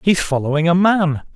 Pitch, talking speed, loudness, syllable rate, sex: 165 Hz, 175 wpm, -16 LUFS, 5.1 syllables/s, male